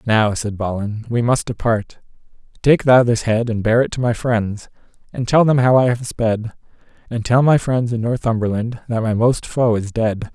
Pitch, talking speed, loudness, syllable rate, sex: 115 Hz, 205 wpm, -18 LUFS, 4.7 syllables/s, male